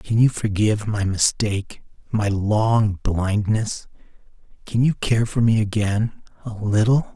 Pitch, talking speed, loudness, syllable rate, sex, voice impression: 105 Hz, 125 wpm, -21 LUFS, 4.0 syllables/s, male, masculine, middle-aged, thick, relaxed, powerful, soft, raspy, intellectual, slightly mature, friendly, wild, lively, slightly strict, slightly sharp